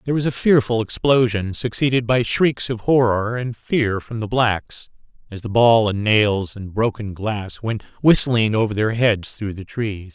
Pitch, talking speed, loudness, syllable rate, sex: 115 Hz, 185 wpm, -19 LUFS, 4.3 syllables/s, male